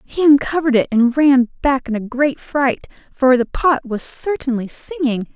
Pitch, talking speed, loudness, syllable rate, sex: 265 Hz, 180 wpm, -17 LUFS, 4.6 syllables/s, female